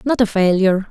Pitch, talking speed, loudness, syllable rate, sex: 205 Hz, 200 wpm, -16 LUFS, 6.3 syllables/s, female